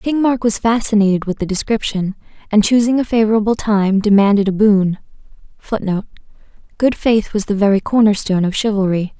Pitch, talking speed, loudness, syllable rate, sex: 210 Hz, 155 wpm, -15 LUFS, 5.9 syllables/s, female